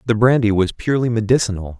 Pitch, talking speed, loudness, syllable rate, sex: 110 Hz, 165 wpm, -17 LUFS, 6.8 syllables/s, male